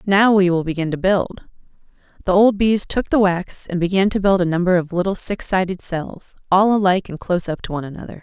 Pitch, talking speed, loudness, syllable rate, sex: 185 Hz, 225 wpm, -18 LUFS, 5.8 syllables/s, female